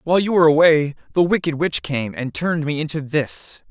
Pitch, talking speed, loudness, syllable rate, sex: 155 Hz, 210 wpm, -19 LUFS, 5.7 syllables/s, male